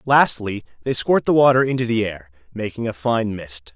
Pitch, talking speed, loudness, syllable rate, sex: 115 Hz, 190 wpm, -20 LUFS, 5.0 syllables/s, male